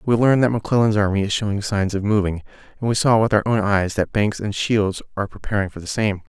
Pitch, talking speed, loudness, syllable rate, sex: 105 Hz, 245 wpm, -20 LUFS, 6.5 syllables/s, male